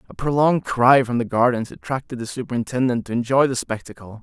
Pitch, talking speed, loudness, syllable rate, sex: 125 Hz, 185 wpm, -20 LUFS, 6.2 syllables/s, male